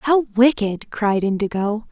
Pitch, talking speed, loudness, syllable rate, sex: 220 Hz, 125 wpm, -19 LUFS, 4.0 syllables/s, female